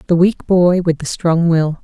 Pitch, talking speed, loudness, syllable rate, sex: 170 Hz, 230 wpm, -14 LUFS, 4.4 syllables/s, female